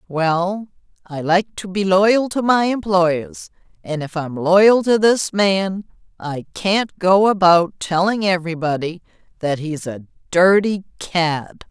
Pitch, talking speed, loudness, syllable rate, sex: 185 Hz, 140 wpm, -18 LUFS, 3.7 syllables/s, female